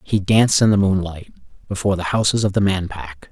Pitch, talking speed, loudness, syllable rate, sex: 95 Hz, 215 wpm, -18 LUFS, 6.0 syllables/s, male